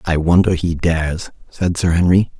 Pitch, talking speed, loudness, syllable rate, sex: 85 Hz, 175 wpm, -16 LUFS, 4.9 syllables/s, male